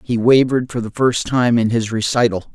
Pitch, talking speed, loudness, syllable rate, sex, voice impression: 120 Hz, 210 wpm, -16 LUFS, 5.5 syllables/s, male, masculine, middle-aged, tensed, powerful, clear, slightly nasal, mature, wild, lively, slightly strict, slightly intense